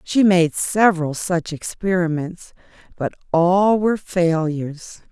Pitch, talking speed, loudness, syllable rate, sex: 175 Hz, 105 wpm, -19 LUFS, 3.9 syllables/s, female